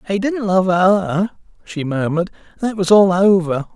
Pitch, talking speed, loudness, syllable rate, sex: 185 Hz, 160 wpm, -16 LUFS, 4.4 syllables/s, male